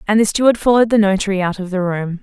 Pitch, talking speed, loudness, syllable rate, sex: 200 Hz, 270 wpm, -15 LUFS, 7.2 syllables/s, female